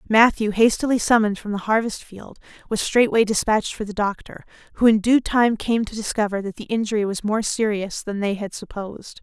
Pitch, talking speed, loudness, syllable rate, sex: 215 Hz, 195 wpm, -21 LUFS, 5.6 syllables/s, female